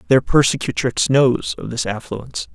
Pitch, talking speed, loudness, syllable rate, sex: 130 Hz, 140 wpm, -18 LUFS, 4.8 syllables/s, male